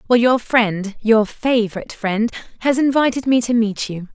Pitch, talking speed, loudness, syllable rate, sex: 230 Hz, 175 wpm, -18 LUFS, 4.8 syllables/s, female